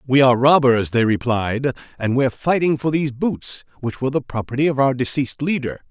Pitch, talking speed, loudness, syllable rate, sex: 130 Hz, 205 wpm, -19 LUFS, 6.1 syllables/s, male